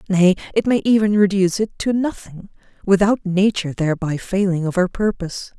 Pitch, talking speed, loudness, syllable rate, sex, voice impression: 195 Hz, 160 wpm, -18 LUFS, 5.6 syllables/s, female, feminine, adult-like, tensed, powerful, clear, fluent, intellectual, calm, elegant, slightly lively, slightly sharp